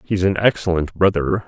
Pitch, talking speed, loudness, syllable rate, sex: 95 Hz, 165 wpm, -18 LUFS, 5.2 syllables/s, male